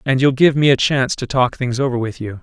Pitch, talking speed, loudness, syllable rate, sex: 130 Hz, 295 wpm, -16 LUFS, 6.1 syllables/s, male